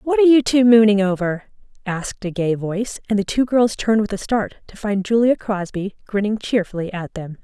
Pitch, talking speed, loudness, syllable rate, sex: 210 Hz, 210 wpm, -19 LUFS, 5.6 syllables/s, female